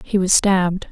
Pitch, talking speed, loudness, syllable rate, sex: 185 Hz, 200 wpm, -16 LUFS, 4.9 syllables/s, female